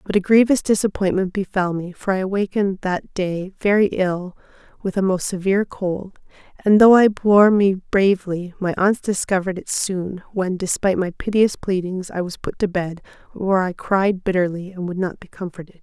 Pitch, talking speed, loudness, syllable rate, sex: 190 Hz, 180 wpm, -20 LUFS, 5.1 syllables/s, female